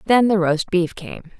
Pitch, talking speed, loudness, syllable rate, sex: 185 Hz, 215 wpm, -19 LUFS, 4.4 syllables/s, female